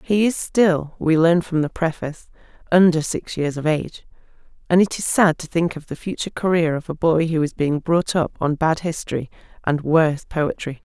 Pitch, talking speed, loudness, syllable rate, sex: 165 Hz, 205 wpm, -20 LUFS, 5.2 syllables/s, female